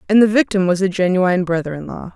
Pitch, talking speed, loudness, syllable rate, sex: 190 Hz, 250 wpm, -17 LUFS, 6.6 syllables/s, female